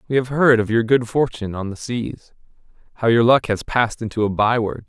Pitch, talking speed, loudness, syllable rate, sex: 115 Hz, 210 wpm, -19 LUFS, 5.7 syllables/s, male